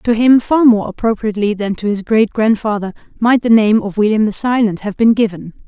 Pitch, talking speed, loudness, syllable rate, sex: 215 Hz, 210 wpm, -14 LUFS, 5.4 syllables/s, female